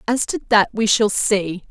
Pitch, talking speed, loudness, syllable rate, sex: 215 Hz, 210 wpm, -18 LUFS, 4.2 syllables/s, female